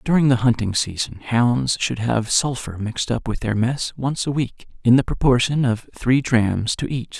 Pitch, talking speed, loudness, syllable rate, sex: 120 Hz, 200 wpm, -20 LUFS, 4.5 syllables/s, male